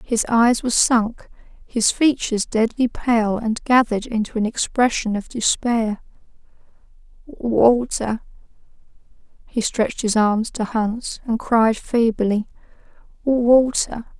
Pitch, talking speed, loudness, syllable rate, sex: 230 Hz, 110 wpm, -19 LUFS, 3.8 syllables/s, female